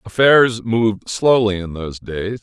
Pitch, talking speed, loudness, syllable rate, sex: 105 Hz, 150 wpm, -17 LUFS, 4.3 syllables/s, male